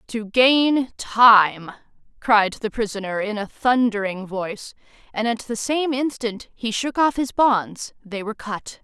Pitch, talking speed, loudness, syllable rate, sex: 225 Hz, 155 wpm, -20 LUFS, 3.9 syllables/s, female